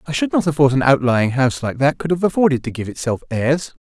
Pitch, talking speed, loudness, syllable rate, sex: 140 Hz, 265 wpm, -18 LUFS, 6.1 syllables/s, male